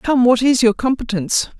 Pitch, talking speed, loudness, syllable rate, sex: 240 Hz, 190 wpm, -16 LUFS, 5.4 syllables/s, female